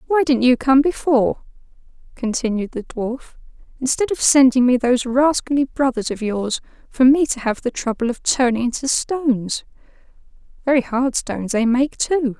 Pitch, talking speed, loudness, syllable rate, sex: 255 Hz, 160 wpm, -18 LUFS, 5.0 syllables/s, female